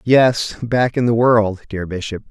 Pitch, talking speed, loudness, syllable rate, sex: 115 Hz, 180 wpm, -17 LUFS, 4.0 syllables/s, male